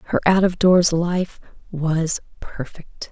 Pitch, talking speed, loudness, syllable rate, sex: 170 Hz, 135 wpm, -19 LUFS, 3.2 syllables/s, female